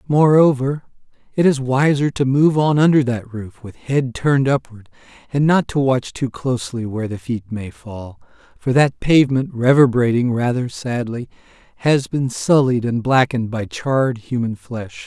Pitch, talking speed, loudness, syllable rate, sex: 130 Hz, 160 wpm, -18 LUFS, 4.7 syllables/s, male